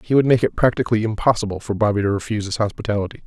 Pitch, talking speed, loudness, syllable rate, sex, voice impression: 105 Hz, 220 wpm, -20 LUFS, 8.0 syllables/s, male, very masculine, very adult-like, very middle-aged, very thick, tensed, very powerful, bright, hard, slightly muffled, fluent, very cool, intellectual, sincere, calm, mature, friendly, reassuring, slightly elegant, wild, slightly sweet, slightly lively, kind, slightly modest